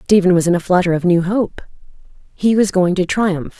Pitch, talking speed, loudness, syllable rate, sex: 185 Hz, 215 wpm, -16 LUFS, 5.3 syllables/s, female